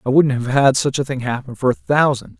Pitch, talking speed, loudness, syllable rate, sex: 130 Hz, 275 wpm, -17 LUFS, 5.7 syllables/s, male